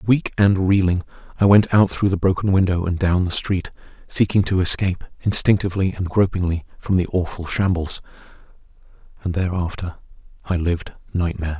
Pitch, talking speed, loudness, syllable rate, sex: 90 Hz, 150 wpm, -20 LUFS, 5.7 syllables/s, male